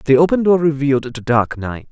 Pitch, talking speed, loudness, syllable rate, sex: 140 Hz, 220 wpm, -16 LUFS, 5.4 syllables/s, male